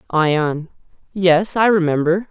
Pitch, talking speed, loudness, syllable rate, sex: 175 Hz, 105 wpm, -17 LUFS, 3.6 syllables/s, male